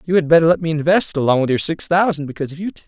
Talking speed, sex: 415 wpm, male